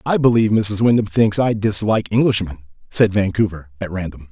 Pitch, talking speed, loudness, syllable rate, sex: 105 Hz, 165 wpm, -17 LUFS, 5.8 syllables/s, male